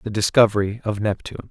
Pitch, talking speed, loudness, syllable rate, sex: 105 Hz, 160 wpm, -20 LUFS, 6.5 syllables/s, male